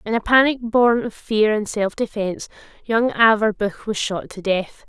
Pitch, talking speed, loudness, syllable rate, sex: 220 Hz, 185 wpm, -19 LUFS, 4.7 syllables/s, female